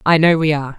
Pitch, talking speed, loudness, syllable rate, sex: 155 Hz, 305 wpm, -15 LUFS, 7.3 syllables/s, female